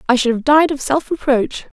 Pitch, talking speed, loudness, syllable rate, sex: 270 Hz, 235 wpm, -16 LUFS, 5.3 syllables/s, female